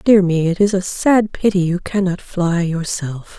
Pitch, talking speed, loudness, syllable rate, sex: 185 Hz, 195 wpm, -17 LUFS, 4.3 syllables/s, female